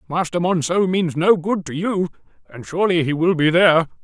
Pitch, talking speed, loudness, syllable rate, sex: 170 Hz, 195 wpm, -18 LUFS, 5.6 syllables/s, male